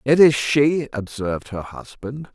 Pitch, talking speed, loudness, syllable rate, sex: 125 Hz, 155 wpm, -19 LUFS, 4.2 syllables/s, male